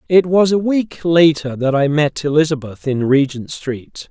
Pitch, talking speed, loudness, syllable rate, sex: 150 Hz, 175 wpm, -16 LUFS, 4.4 syllables/s, male